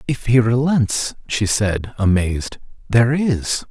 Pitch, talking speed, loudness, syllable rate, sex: 115 Hz, 130 wpm, -18 LUFS, 3.9 syllables/s, male